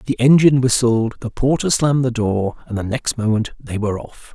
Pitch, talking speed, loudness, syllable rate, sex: 120 Hz, 205 wpm, -18 LUFS, 5.4 syllables/s, male